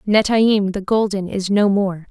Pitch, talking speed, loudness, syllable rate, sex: 200 Hz, 170 wpm, -17 LUFS, 4.1 syllables/s, female